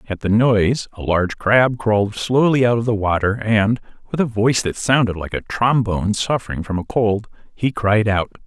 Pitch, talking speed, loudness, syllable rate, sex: 110 Hz, 200 wpm, -18 LUFS, 5.2 syllables/s, male